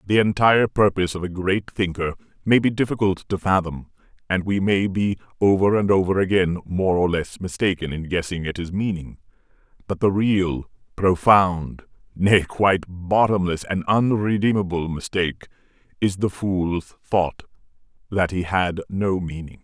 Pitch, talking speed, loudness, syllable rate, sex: 95 Hz, 145 wpm, -21 LUFS, 4.7 syllables/s, male